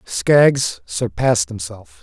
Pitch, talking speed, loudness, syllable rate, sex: 125 Hz, 90 wpm, -17 LUFS, 3.2 syllables/s, male